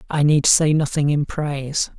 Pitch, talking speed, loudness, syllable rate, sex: 145 Hz, 180 wpm, -18 LUFS, 4.6 syllables/s, male